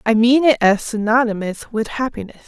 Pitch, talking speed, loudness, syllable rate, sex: 225 Hz, 170 wpm, -17 LUFS, 5.3 syllables/s, female